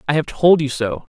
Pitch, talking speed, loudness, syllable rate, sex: 145 Hz, 265 wpm, -17 LUFS, 5.4 syllables/s, male